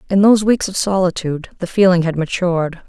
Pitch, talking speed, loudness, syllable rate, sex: 185 Hz, 190 wpm, -16 LUFS, 6.3 syllables/s, female